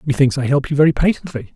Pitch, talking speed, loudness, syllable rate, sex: 140 Hz, 230 wpm, -16 LUFS, 7.0 syllables/s, male